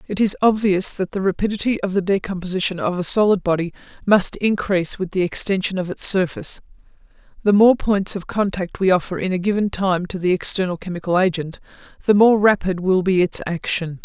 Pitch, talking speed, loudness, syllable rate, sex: 190 Hz, 190 wpm, -19 LUFS, 5.7 syllables/s, female